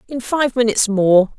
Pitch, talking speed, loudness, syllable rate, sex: 230 Hz, 175 wpm, -16 LUFS, 5.8 syllables/s, female